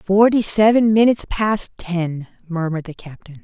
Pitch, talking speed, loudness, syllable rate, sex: 190 Hz, 140 wpm, -17 LUFS, 4.8 syllables/s, female